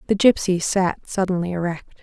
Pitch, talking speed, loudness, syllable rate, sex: 185 Hz, 150 wpm, -21 LUFS, 5.4 syllables/s, female